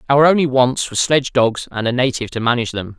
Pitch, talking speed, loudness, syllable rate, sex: 125 Hz, 240 wpm, -17 LUFS, 6.8 syllables/s, male